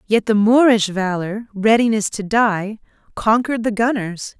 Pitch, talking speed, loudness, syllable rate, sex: 215 Hz, 135 wpm, -17 LUFS, 4.4 syllables/s, female